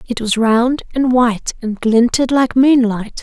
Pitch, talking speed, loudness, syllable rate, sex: 240 Hz, 165 wpm, -14 LUFS, 4.1 syllables/s, female